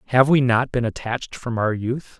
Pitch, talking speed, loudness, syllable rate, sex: 120 Hz, 220 wpm, -21 LUFS, 5.2 syllables/s, male